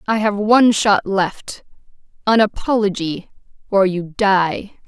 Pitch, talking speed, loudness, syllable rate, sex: 200 Hz, 110 wpm, -17 LUFS, 3.9 syllables/s, female